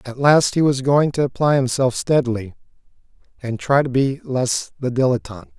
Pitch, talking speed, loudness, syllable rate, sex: 130 Hz, 170 wpm, -19 LUFS, 5.1 syllables/s, male